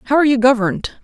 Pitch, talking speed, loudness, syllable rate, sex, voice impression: 250 Hz, 230 wpm, -15 LUFS, 8.4 syllables/s, female, feminine, adult-like, tensed, powerful, clear, fluent, intellectual, calm, reassuring, modest